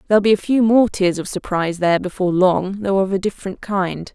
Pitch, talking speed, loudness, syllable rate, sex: 190 Hz, 230 wpm, -18 LUFS, 6.1 syllables/s, female